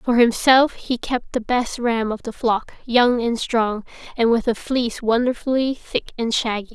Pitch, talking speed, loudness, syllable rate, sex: 235 Hz, 185 wpm, -20 LUFS, 4.5 syllables/s, female